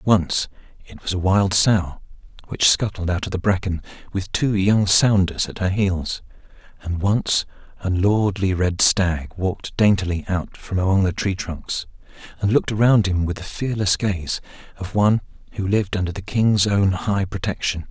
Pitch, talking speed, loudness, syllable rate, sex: 95 Hz, 170 wpm, -21 LUFS, 4.7 syllables/s, male